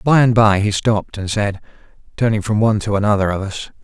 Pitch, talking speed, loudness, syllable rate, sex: 105 Hz, 220 wpm, -17 LUFS, 6.0 syllables/s, male